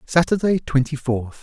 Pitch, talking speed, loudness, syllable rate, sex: 145 Hz, 125 wpm, -20 LUFS, 4.5 syllables/s, male